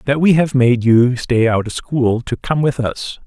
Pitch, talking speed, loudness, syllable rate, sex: 130 Hz, 240 wpm, -15 LUFS, 4.2 syllables/s, male